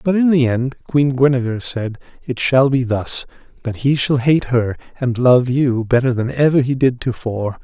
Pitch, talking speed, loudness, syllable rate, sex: 130 Hz, 205 wpm, -17 LUFS, 4.6 syllables/s, male